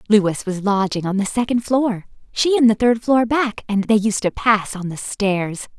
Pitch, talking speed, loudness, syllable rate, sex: 215 Hz, 220 wpm, -19 LUFS, 4.4 syllables/s, female